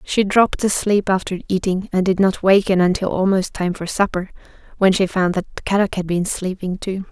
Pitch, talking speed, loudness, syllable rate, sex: 190 Hz, 195 wpm, -19 LUFS, 5.2 syllables/s, female